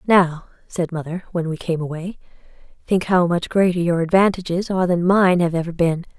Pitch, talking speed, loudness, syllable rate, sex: 175 Hz, 185 wpm, -19 LUFS, 5.4 syllables/s, female